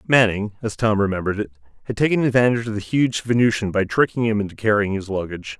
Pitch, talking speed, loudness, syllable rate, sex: 110 Hz, 205 wpm, -20 LUFS, 6.9 syllables/s, male